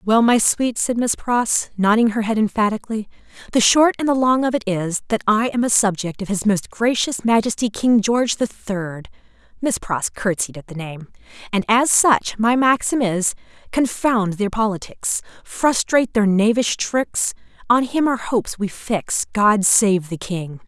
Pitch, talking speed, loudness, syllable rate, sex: 220 Hz, 175 wpm, -19 LUFS, 4.5 syllables/s, female